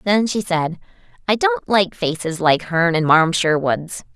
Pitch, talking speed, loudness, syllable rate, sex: 175 Hz, 175 wpm, -18 LUFS, 4.0 syllables/s, female